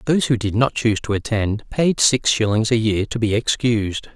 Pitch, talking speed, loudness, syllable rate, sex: 115 Hz, 215 wpm, -19 LUFS, 5.3 syllables/s, male